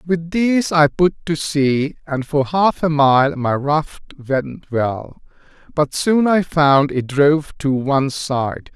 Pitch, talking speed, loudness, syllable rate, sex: 150 Hz, 165 wpm, -17 LUFS, 3.6 syllables/s, male